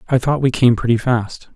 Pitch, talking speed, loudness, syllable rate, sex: 125 Hz, 230 wpm, -16 LUFS, 5.1 syllables/s, male